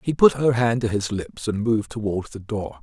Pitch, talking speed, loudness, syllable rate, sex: 110 Hz, 255 wpm, -22 LUFS, 5.2 syllables/s, male